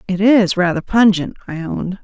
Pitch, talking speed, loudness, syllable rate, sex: 190 Hz, 175 wpm, -15 LUFS, 5.1 syllables/s, female